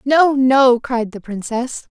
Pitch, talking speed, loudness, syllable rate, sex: 250 Hz, 155 wpm, -16 LUFS, 3.4 syllables/s, female